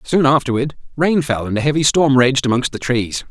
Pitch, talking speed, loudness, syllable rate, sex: 135 Hz, 220 wpm, -16 LUFS, 5.3 syllables/s, male